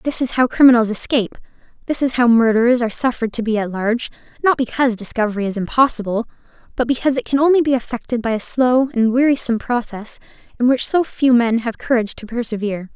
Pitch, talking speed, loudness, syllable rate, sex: 240 Hz, 190 wpm, -17 LUFS, 6.6 syllables/s, female